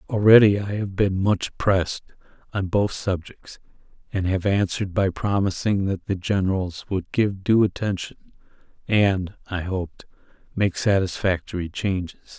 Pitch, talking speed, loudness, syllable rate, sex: 95 Hz, 130 wpm, -22 LUFS, 4.7 syllables/s, male